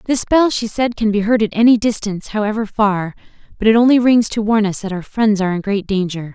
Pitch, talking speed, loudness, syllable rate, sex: 215 Hz, 245 wpm, -16 LUFS, 6.0 syllables/s, female